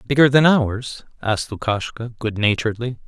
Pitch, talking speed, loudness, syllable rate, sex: 120 Hz, 135 wpm, -19 LUFS, 5.2 syllables/s, male